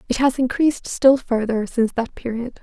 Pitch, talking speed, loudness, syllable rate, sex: 245 Hz, 185 wpm, -20 LUFS, 5.3 syllables/s, female